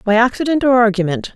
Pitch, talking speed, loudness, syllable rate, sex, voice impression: 230 Hz, 175 wpm, -15 LUFS, 6.4 syllables/s, female, very feminine, adult-like, intellectual, slightly calm